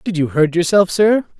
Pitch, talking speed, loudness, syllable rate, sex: 180 Hz, 215 wpm, -15 LUFS, 5.0 syllables/s, male